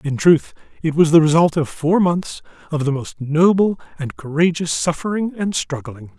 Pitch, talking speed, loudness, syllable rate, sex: 160 Hz, 175 wpm, -18 LUFS, 4.7 syllables/s, male